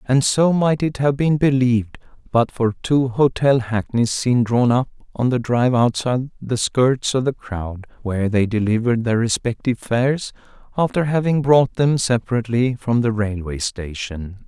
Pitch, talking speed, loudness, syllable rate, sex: 120 Hz, 160 wpm, -19 LUFS, 4.8 syllables/s, male